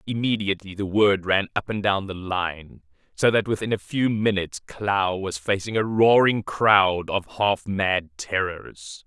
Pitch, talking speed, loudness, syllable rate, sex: 100 Hz, 165 wpm, -23 LUFS, 4.1 syllables/s, male